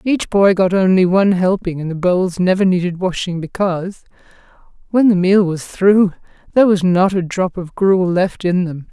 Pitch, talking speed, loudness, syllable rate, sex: 185 Hz, 190 wpm, -15 LUFS, 4.9 syllables/s, female